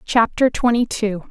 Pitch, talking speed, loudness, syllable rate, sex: 225 Hz, 140 wpm, -18 LUFS, 4.1 syllables/s, female